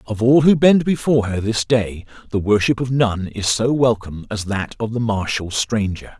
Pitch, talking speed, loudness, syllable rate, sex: 115 Hz, 205 wpm, -18 LUFS, 4.9 syllables/s, male